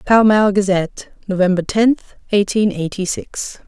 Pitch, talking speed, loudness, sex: 200 Hz, 130 wpm, -17 LUFS, female